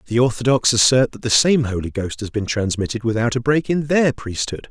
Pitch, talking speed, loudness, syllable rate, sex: 120 Hz, 215 wpm, -18 LUFS, 5.3 syllables/s, male